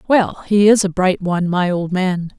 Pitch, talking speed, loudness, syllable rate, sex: 185 Hz, 225 wpm, -16 LUFS, 4.6 syllables/s, female